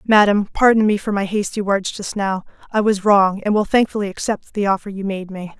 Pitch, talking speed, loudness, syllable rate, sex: 200 Hz, 225 wpm, -18 LUFS, 5.4 syllables/s, female